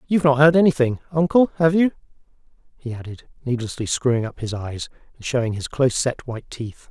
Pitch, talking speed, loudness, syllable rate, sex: 135 Hz, 180 wpm, -20 LUFS, 6.0 syllables/s, male